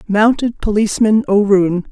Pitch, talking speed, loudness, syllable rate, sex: 210 Hz, 95 wpm, -14 LUFS, 4.7 syllables/s, female